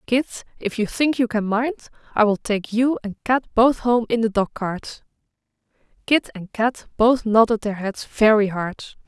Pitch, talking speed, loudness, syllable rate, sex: 225 Hz, 185 wpm, -20 LUFS, 4.4 syllables/s, female